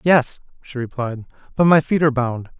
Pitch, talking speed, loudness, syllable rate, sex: 135 Hz, 185 wpm, -19 LUFS, 5.2 syllables/s, male